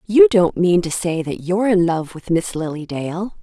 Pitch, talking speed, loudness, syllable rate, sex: 180 Hz, 230 wpm, -18 LUFS, 4.3 syllables/s, female